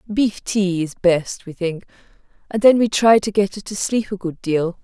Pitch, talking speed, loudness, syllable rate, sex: 195 Hz, 225 wpm, -19 LUFS, 4.5 syllables/s, female